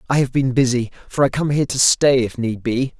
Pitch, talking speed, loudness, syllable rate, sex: 130 Hz, 260 wpm, -18 LUFS, 5.7 syllables/s, male